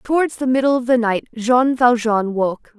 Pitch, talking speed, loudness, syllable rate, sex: 240 Hz, 195 wpm, -17 LUFS, 4.6 syllables/s, female